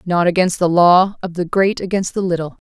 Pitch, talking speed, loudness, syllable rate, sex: 180 Hz, 225 wpm, -16 LUFS, 5.3 syllables/s, female